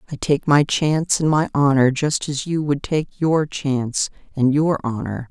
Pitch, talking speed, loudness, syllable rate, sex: 145 Hz, 190 wpm, -19 LUFS, 4.5 syllables/s, female